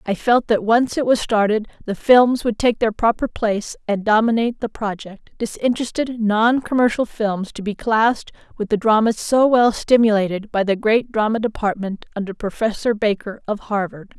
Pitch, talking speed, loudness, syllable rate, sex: 220 Hz, 170 wpm, -19 LUFS, 5.0 syllables/s, female